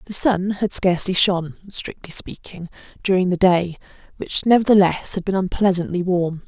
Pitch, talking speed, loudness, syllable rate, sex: 185 Hz, 130 wpm, -19 LUFS, 5.1 syllables/s, female